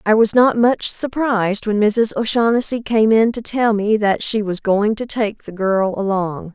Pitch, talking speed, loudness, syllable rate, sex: 215 Hz, 200 wpm, -17 LUFS, 4.4 syllables/s, female